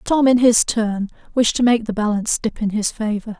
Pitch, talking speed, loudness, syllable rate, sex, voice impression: 225 Hz, 230 wpm, -18 LUFS, 5.3 syllables/s, female, very feminine, young, very thin, relaxed, slightly powerful, bright, hard, slightly clear, fluent, slightly raspy, very cute, intellectual, very refreshing, sincere, calm, very friendly, reassuring, very unique, elegant, slightly wild, sweet, slightly lively, slightly strict, slightly intense, slightly sharp, modest